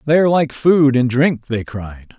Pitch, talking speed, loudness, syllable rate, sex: 135 Hz, 220 wpm, -15 LUFS, 4.5 syllables/s, male